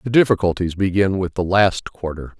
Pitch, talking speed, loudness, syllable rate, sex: 95 Hz, 175 wpm, -19 LUFS, 5.2 syllables/s, male